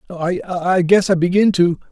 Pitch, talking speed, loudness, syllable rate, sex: 180 Hz, 155 wpm, -16 LUFS, 4.3 syllables/s, male